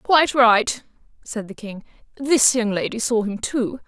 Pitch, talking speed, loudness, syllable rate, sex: 235 Hz, 170 wpm, -19 LUFS, 4.2 syllables/s, female